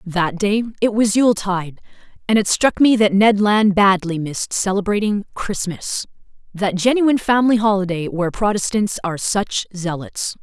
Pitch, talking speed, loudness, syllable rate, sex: 200 Hz, 145 wpm, -18 LUFS, 5.0 syllables/s, female